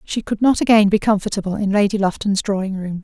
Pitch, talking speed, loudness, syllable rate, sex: 205 Hz, 215 wpm, -18 LUFS, 6.1 syllables/s, female